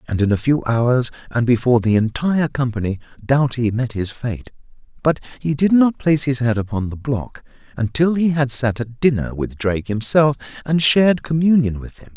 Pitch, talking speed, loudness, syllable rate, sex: 130 Hz, 190 wpm, -18 LUFS, 5.3 syllables/s, male